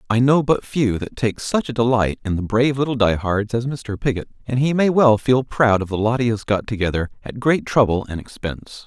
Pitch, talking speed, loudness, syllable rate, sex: 115 Hz, 245 wpm, -19 LUFS, 5.4 syllables/s, male